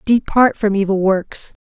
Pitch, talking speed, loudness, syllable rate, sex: 205 Hz, 145 wpm, -16 LUFS, 4.1 syllables/s, female